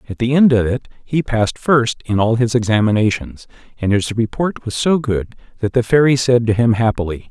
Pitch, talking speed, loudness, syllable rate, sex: 120 Hz, 205 wpm, -16 LUFS, 5.3 syllables/s, male